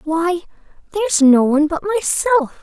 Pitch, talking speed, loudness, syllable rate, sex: 340 Hz, 135 wpm, -16 LUFS, 4.8 syllables/s, female